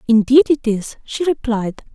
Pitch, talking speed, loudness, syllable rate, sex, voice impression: 245 Hz, 155 wpm, -17 LUFS, 4.6 syllables/s, female, feminine, slightly young, slightly weak, soft, slightly halting, friendly, reassuring, kind, modest